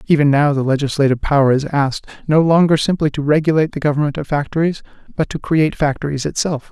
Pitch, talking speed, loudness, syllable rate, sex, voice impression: 150 Hz, 190 wpm, -16 LUFS, 6.8 syllables/s, male, very masculine, middle-aged, thick, tensed, powerful, slightly bright, slightly hard, clear, very fluent, cool, intellectual, refreshing, slightly sincere, calm, friendly, reassuring, slightly unique, slightly elegant, wild, slightly sweet, slightly lively, kind, modest